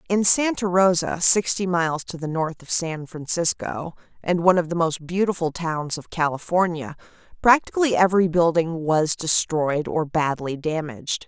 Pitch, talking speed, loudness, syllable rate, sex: 170 Hz, 150 wpm, -21 LUFS, 4.9 syllables/s, female